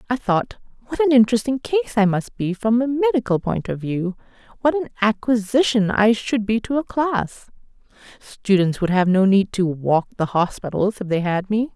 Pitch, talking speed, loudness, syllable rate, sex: 220 Hz, 190 wpm, -20 LUFS, 4.9 syllables/s, female